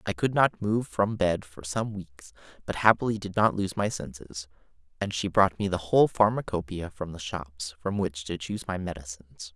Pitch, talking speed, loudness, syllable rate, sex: 90 Hz, 200 wpm, -27 LUFS, 5.0 syllables/s, male